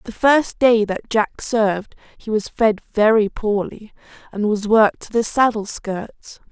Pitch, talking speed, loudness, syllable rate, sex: 215 Hz, 155 wpm, -18 LUFS, 4.3 syllables/s, female